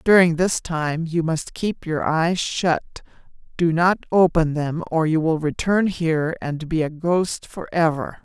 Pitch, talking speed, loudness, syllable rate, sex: 165 Hz, 165 wpm, -21 LUFS, 4.0 syllables/s, female